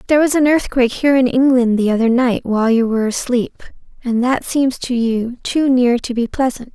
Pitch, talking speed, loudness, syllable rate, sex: 250 Hz, 215 wpm, -16 LUFS, 5.5 syllables/s, female